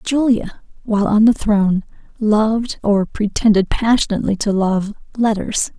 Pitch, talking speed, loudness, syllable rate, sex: 215 Hz, 125 wpm, -17 LUFS, 4.7 syllables/s, female